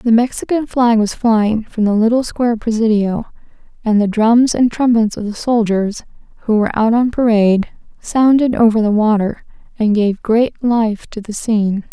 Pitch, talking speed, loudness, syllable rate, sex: 225 Hz, 170 wpm, -15 LUFS, 4.9 syllables/s, female